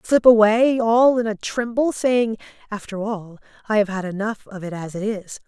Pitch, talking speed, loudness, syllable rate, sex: 215 Hz, 195 wpm, -20 LUFS, 4.7 syllables/s, female